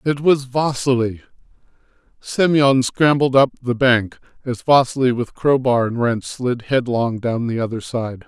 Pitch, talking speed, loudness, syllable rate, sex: 125 Hz, 150 wpm, -18 LUFS, 4.3 syllables/s, male